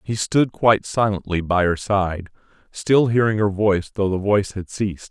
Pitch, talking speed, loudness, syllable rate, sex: 100 Hz, 190 wpm, -20 LUFS, 5.1 syllables/s, male